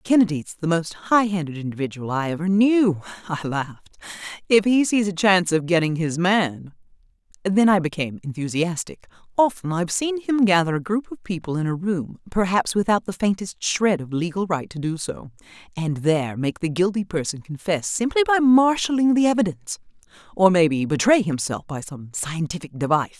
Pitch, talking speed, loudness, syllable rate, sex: 180 Hz, 175 wpm, -21 LUFS, 5.4 syllables/s, female